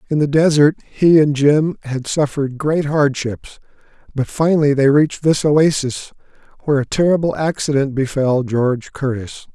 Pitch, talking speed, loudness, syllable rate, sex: 145 Hz, 145 wpm, -16 LUFS, 4.8 syllables/s, male